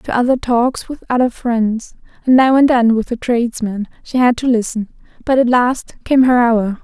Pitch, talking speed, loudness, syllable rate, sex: 240 Hz, 200 wpm, -15 LUFS, 4.8 syllables/s, female